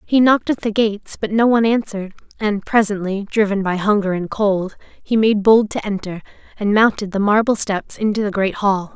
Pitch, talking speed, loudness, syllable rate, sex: 205 Hz, 200 wpm, -18 LUFS, 5.4 syllables/s, female